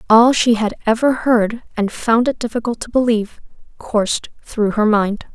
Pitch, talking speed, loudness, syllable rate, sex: 225 Hz, 170 wpm, -17 LUFS, 4.7 syllables/s, female